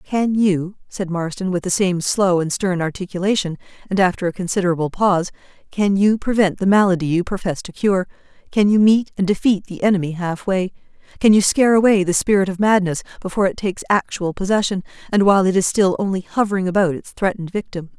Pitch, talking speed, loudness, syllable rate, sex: 190 Hz, 180 wpm, -18 LUFS, 6.1 syllables/s, female